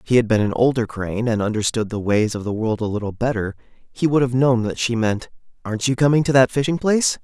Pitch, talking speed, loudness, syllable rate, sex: 120 Hz, 255 wpm, -20 LUFS, 6.2 syllables/s, male